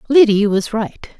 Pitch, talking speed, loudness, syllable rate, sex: 225 Hz, 150 wpm, -15 LUFS, 4.4 syllables/s, female